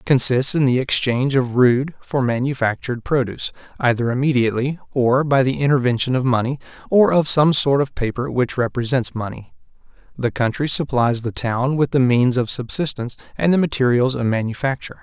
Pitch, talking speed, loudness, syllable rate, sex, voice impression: 130 Hz, 170 wpm, -19 LUFS, 5.6 syllables/s, male, masculine, middle-aged, thick, slightly tensed, powerful, hard, clear, slightly halting, sincere, calm, mature, wild, lively, strict